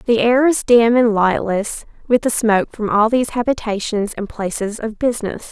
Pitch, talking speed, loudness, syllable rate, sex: 225 Hz, 185 wpm, -17 LUFS, 4.9 syllables/s, female